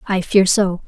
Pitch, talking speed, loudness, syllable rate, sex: 190 Hz, 205 wpm, -16 LUFS, 4.0 syllables/s, female